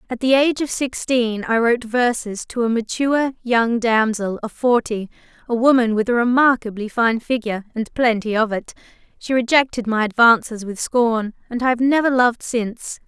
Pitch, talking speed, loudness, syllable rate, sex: 235 Hz, 170 wpm, -19 LUFS, 5.2 syllables/s, female